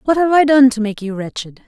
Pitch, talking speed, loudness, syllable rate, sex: 250 Hz, 285 wpm, -14 LUFS, 6.0 syllables/s, female